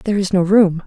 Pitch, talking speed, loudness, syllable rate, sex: 190 Hz, 275 wpm, -15 LUFS, 6.0 syllables/s, female